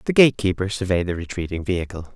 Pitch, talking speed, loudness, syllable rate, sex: 95 Hz, 165 wpm, -22 LUFS, 7.0 syllables/s, male